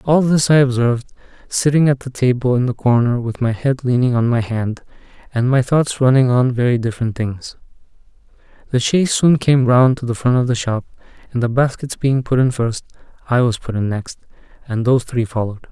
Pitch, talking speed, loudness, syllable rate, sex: 125 Hz, 200 wpm, -17 LUFS, 5.6 syllables/s, male